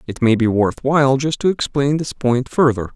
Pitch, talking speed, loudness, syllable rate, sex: 130 Hz, 225 wpm, -17 LUFS, 5.1 syllables/s, male